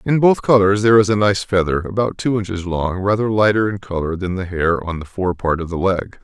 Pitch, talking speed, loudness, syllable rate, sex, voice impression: 95 Hz, 250 wpm, -18 LUFS, 5.6 syllables/s, male, masculine, adult-like, thick, tensed, powerful, slightly hard, clear, cool, calm, friendly, wild, lively